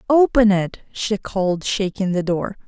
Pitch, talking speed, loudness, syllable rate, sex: 200 Hz, 155 wpm, -20 LUFS, 4.3 syllables/s, female